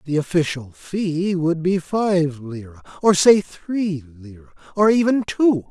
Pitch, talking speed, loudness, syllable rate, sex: 170 Hz, 125 wpm, -19 LUFS, 3.9 syllables/s, male